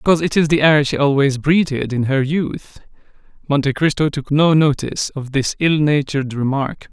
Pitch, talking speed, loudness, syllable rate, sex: 145 Hz, 180 wpm, -17 LUFS, 5.3 syllables/s, male